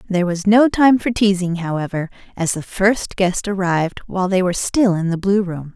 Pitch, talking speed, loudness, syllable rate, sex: 190 Hz, 210 wpm, -18 LUFS, 5.4 syllables/s, female